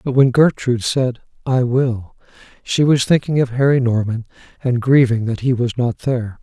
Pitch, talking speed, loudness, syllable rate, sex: 125 Hz, 175 wpm, -17 LUFS, 5.0 syllables/s, male